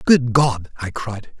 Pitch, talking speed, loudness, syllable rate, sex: 120 Hz, 170 wpm, -20 LUFS, 3.7 syllables/s, male